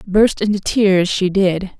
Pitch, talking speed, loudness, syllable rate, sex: 195 Hz, 165 wpm, -16 LUFS, 3.8 syllables/s, female